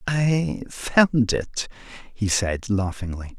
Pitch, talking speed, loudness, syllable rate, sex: 115 Hz, 105 wpm, -23 LUFS, 2.8 syllables/s, male